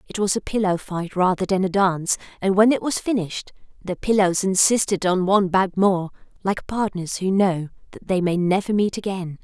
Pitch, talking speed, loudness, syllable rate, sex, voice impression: 190 Hz, 195 wpm, -21 LUFS, 5.3 syllables/s, female, feminine, adult-like, relaxed, powerful, bright, soft, raspy, intellectual, elegant, lively